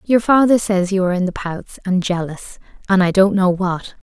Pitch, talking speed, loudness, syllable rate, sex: 190 Hz, 220 wpm, -17 LUFS, 5.1 syllables/s, female